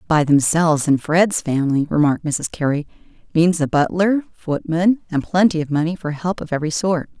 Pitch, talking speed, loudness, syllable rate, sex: 160 Hz, 175 wpm, -18 LUFS, 5.4 syllables/s, female